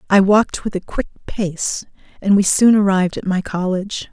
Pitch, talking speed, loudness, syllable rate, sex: 195 Hz, 190 wpm, -17 LUFS, 5.3 syllables/s, female